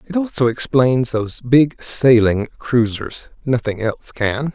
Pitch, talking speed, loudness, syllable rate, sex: 125 Hz, 130 wpm, -17 LUFS, 4.1 syllables/s, male